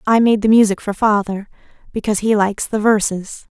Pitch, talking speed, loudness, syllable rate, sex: 210 Hz, 185 wpm, -16 LUFS, 5.8 syllables/s, female